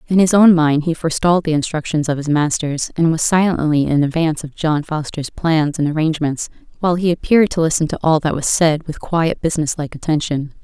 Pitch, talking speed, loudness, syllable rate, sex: 160 Hz, 210 wpm, -17 LUFS, 5.9 syllables/s, female